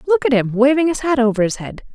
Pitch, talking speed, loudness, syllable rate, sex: 255 Hz, 275 wpm, -16 LUFS, 6.3 syllables/s, female